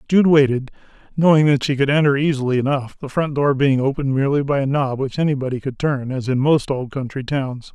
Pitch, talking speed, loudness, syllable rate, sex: 135 Hz, 215 wpm, -19 LUFS, 5.9 syllables/s, male